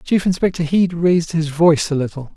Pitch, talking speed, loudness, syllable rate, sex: 165 Hz, 205 wpm, -17 LUFS, 5.8 syllables/s, male